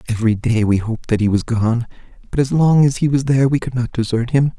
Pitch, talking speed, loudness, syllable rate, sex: 120 Hz, 260 wpm, -17 LUFS, 6.3 syllables/s, male